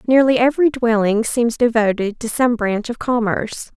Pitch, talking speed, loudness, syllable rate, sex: 230 Hz, 160 wpm, -17 LUFS, 5.0 syllables/s, female